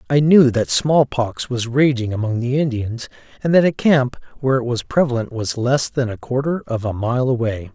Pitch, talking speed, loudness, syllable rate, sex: 125 Hz, 200 wpm, -18 LUFS, 5.0 syllables/s, male